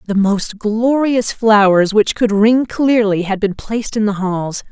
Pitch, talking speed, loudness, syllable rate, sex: 215 Hz, 180 wpm, -15 LUFS, 4.0 syllables/s, female